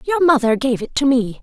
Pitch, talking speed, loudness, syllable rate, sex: 260 Hz, 255 wpm, -17 LUFS, 5.4 syllables/s, female